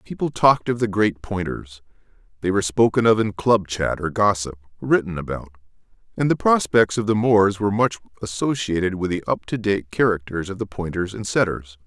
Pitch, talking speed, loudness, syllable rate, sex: 100 Hz, 175 wpm, -21 LUFS, 5.4 syllables/s, male